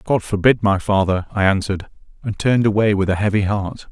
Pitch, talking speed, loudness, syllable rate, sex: 100 Hz, 200 wpm, -18 LUFS, 5.9 syllables/s, male